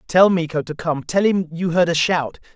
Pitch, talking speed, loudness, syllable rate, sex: 165 Hz, 210 wpm, -19 LUFS, 4.9 syllables/s, male